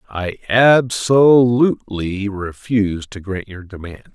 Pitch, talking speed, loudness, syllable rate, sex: 105 Hz, 145 wpm, -16 LUFS, 3.6 syllables/s, male